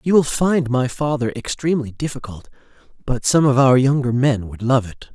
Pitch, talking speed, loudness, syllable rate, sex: 130 Hz, 185 wpm, -18 LUFS, 5.1 syllables/s, male